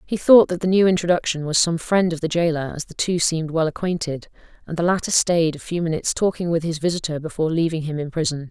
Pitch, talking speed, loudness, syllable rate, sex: 165 Hz, 240 wpm, -20 LUFS, 6.4 syllables/s, female